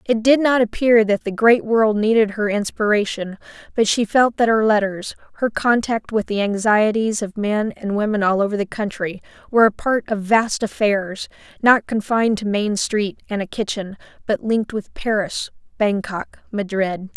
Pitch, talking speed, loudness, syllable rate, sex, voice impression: 210 Hz, 175 wpm, -19 LUFS, 4.8 syllables/s, female, feminine, slightly young, slightly adult-like, thin, tensed, slightly powerful, bright, hard, clear, slightly fluent, slightly cute, slightly cool, intellectual, refreshing, very sincere, slightly calm, friendly, slightly reassuring, slightly unique, elegant, slightly wild, slightly sweet, very lively, slightly strict, slightly intense, slightly sharp